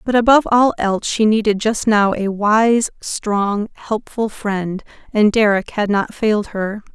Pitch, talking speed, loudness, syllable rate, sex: 215 Hz, 165 wpm, -17 LUFS, 4.2 syllables/s, female